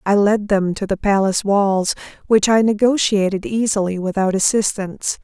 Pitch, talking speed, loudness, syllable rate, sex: 200 Hz, 150 wpm, -17 LUFS, 5.0 syllables/s, female